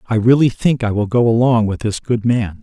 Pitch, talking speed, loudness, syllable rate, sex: 115 Hz, 250 wpm, -16 LUFS, 5.2 syllables/s, male